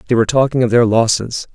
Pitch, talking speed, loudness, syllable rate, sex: 120 Hz, 235 wpm, -14 LUFS, 6.9 syllables/s, male